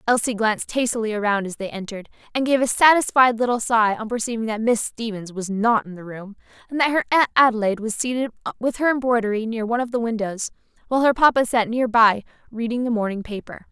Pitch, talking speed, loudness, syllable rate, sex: 230 Hz, 210 wpm, -21 LUFS, 6.3 syllables/s, female